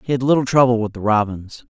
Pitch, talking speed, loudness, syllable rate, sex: 120 Hz, 245 wpm, -17 LUFS, 6.3 syllables/s, male